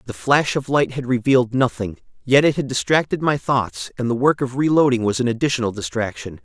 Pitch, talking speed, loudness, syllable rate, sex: 130 Hz, 205 wpm, -19 LUFS, 5.7 syllables/s, male